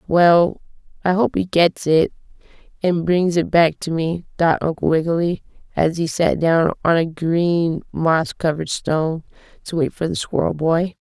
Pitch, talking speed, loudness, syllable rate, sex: 165 Hz, 170 wpm, -19 LUFS, 4.4 syllables/s, female